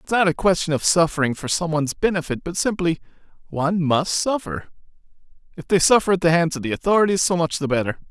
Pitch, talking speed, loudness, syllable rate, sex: 170 Hz, 200 wpm, -20 LUFS, 6.4 syllables/s, male